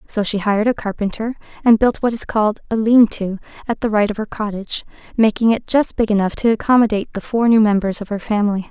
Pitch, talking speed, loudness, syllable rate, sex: 215 Hz, 225 wpm, -17 LUFS, 6.3 syllables/s, female